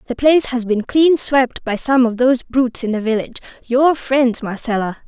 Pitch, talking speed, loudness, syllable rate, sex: 250 Hz, 190 wpm, -16 LUFS, 5.3 syllables/s, female